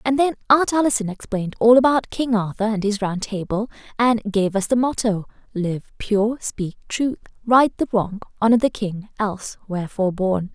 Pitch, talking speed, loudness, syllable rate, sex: 215 Hz, 175 wpm, -21 LUFS, 5.1 syllables/s, female